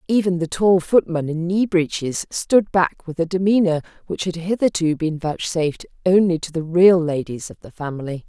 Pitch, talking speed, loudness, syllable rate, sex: 175 Hz, 180 wpm, -20 LUFS, 5.0 syllables/s, female